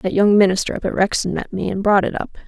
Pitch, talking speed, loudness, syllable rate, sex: 195 Hz, 290 wpm, -18 LUFS, 6.6 syllables/s, female